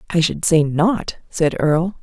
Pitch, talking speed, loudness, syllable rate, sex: 165 Hz, 180 wpm, -18 LUFS, 4.0 syllables/s, female